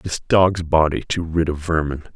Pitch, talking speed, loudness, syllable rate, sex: 80 Hz, 165 wpm, -19 LUFS, 4.8 syllables/s, male